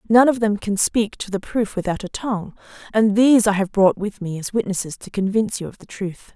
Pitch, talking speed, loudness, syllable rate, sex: 205 Hz, 245 wpm, -20 LUFS, 5.7 syllables/s, female